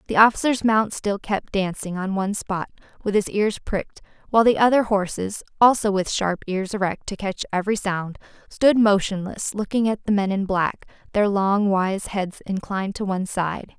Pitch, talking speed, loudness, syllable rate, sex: 200 Hz, 185 wpm, -22 LUFS, 5.0 syllables/s, female